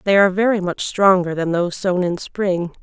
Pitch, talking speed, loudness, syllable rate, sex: 185 Hz, 215 wpm, -18 LUFS, 5.3 syllables/s, female